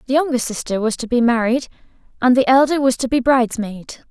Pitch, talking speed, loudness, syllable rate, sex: 245 Hz, 205 wpm, -17 LUFS, 5.9 syllables/s, female